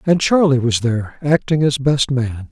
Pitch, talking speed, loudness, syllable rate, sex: 135 Hz, 190 wpm, -16 LUFS, 4.8 syllables/s, male